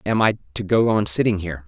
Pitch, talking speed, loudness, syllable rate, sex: 100 Hz, 250 wpm, -19 LUFS, 6.5 syllables/s, male